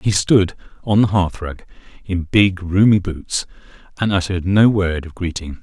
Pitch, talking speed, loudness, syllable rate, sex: 95 Hz, 160 wpm, -17 LUFS, 4.6 syllables/s, male